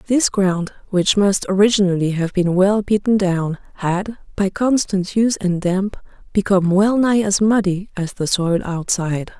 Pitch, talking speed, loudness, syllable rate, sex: 195 Hz, 160 wpm, -18 LUFS, 4.5 syllables/s, female